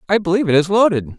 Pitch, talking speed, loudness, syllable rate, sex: 180 Hz, 255 wpm, -15 LUFS, 8.1 syllables/s, male